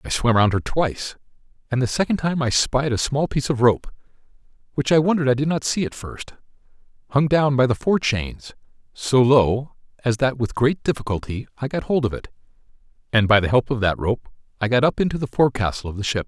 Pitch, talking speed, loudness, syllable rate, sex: 125 Hz, 220 wpm, -21 LUFS, 5.8 syllables/s, male